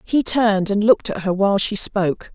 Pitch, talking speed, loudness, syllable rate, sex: 205 Hz, 230 wpm, -18 LUFS, 5.8 syllables/s, female